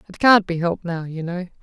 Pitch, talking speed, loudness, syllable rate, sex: 180 Hz, 260 wpm, -20 LUFS, 6.1 syllables/s, female